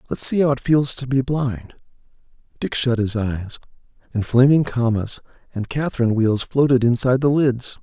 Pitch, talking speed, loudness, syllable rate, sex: 125 Hz, 170 wpm, -20 LUFS, 5.1 syllables/s, male